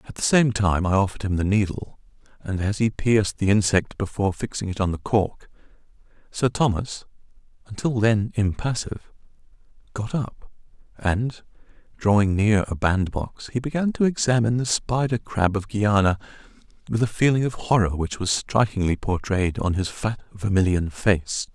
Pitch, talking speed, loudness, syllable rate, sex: 105 Hz, 155 wpm, -23 LUFS, 5.0 syllables/s, male